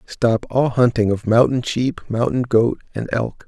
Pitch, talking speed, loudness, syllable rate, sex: 120 Hz, 175 wpm, -19 LUFS, 4.2 syllables/s, male